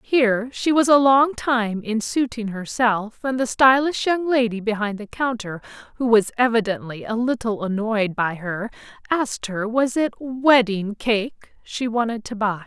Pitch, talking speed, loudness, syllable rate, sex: 230 Hz, 165 wpm, -21 LUFS, 4.3 syllables/s, female